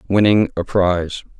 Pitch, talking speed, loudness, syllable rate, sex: 95 Hz, 130 wpm, -17 LUFS, 5.1 syllables/s, male